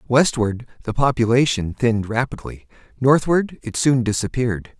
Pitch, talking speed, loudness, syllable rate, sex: 120 Hz, 115 wpm, -20 LUFS, 4.9 syllables/s, male